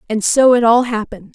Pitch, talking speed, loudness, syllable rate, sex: 230 Hz, 225 wpm, -13 LUFS, 6.0 syllables/s, female